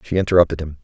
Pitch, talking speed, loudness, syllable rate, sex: 85 Hz, 215 wpm, -17 LUFS, 8.3 syllables/s, male